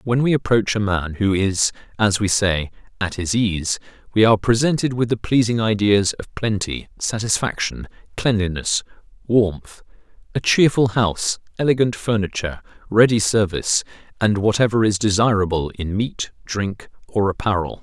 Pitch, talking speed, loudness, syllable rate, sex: 105 Hz, 140 wpm, -20 LUFS, 4.9 syllables/s, male